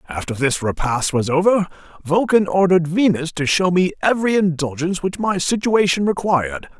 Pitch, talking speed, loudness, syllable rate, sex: 175 Hz, 150 wpm, -18 LUFS, 5.4 syllables/s, male